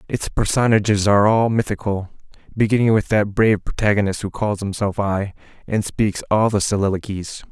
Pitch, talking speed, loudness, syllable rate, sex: 105 Hz, 150 wpm, -19 LUFS, 5.4 syllables/s, male